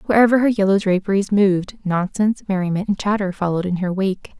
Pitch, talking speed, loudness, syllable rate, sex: 195 Hz, 175 wpm, -19 LUFS, 6.3 syllables/s, female